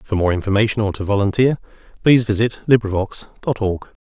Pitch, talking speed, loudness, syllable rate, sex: 105 Hz, 165 wpm, -18 LUFS, 6.3 syllables/s, male